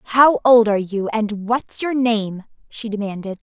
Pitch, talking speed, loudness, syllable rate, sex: 220 Hz, 170 wpm, -18 LUFS, 4.2 syllables/s, female